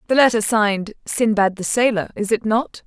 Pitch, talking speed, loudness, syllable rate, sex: 215 Hz, 190 wpm, -19 LUFS, 5.1 syllables/s, female